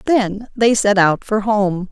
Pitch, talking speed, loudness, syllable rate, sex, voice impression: 205 Hz, 190 wpm, -16 LUFS, 3.5 syllables/s, female, feminine, middle-aged, tensed, powerful, bright, clear, slightly halting, slightly nasal, elegant, lively, slightly intense, slightly sharp